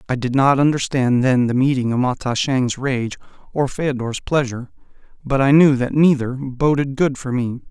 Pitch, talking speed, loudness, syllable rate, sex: 130 Hz, 180 wpm, -18 LUFS, 4.9 syllables/s, male